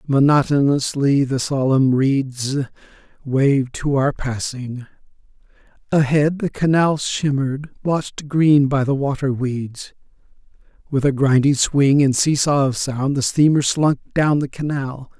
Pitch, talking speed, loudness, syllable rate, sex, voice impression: 140 Hz, 130 wpm, -18 LUFS, 4.0 syllables/s, male, masculine, adult-like, slightly muffled, sincere, slightly calm, slightly kind